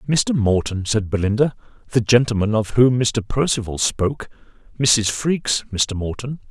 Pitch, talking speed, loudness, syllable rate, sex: 115 Hz, 140 wpm, -19 LUFS, 5.1 syllables/s, male